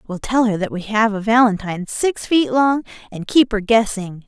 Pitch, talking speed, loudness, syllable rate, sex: 220 Hz, 210 wpm, -18 LUFS, 5.0 syllables/s, female